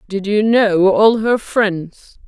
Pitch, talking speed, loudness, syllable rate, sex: 205 Hz, 160 wpm, -14 LUFS, 3.0 syllables/s, female